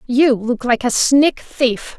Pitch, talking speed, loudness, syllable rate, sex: 250 Hz, 180 wpm, -16 LUFS, 3.3 syllables/s, female